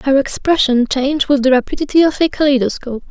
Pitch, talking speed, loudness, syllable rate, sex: 275 Hz, 175 wpm, -14 LUFS, 6.3 syllables/s, female